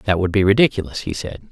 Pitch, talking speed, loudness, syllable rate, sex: 100 Hz, 235 wpm, -18 LUFS, 6.5 syllables/s, male